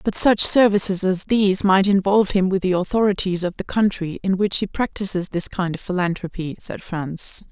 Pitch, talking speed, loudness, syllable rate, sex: 190 Hz, 190 wpm, -20 LUFS, 5.2 syllables/s, female